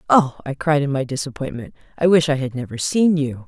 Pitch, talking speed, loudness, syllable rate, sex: 140 Hz, 225 wpm, -20 LUFS, 5.8 syllables/s, female